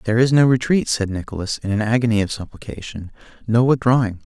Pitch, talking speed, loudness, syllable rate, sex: 115 Hz, 180 wpm, -19 LUFS, 6.3 syllables/s, male